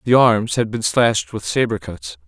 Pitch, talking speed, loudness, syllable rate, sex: 110 Hz, 210 wpm, -18 LUFS, 4.9 syllables/s, male